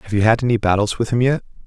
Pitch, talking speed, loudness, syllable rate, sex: 115 Hz, 290 wpm, -18 LUFS, 7.0 syllables/s, male